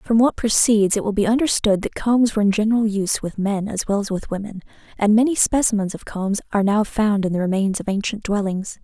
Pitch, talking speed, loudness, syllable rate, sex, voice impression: 210 Hz, 230 wpm, -20 LUFS, 6.1 syllables/s, female, very feminine, slightly young, slightly adult-like, thin, very relaxed, weak, bright, very soft, clear, very fluent, very cute, very intellectual, very refreshing, sincere, very calm, very friendly, very reassuring, very unique, very elegant, very sweet, very kind, very modest, light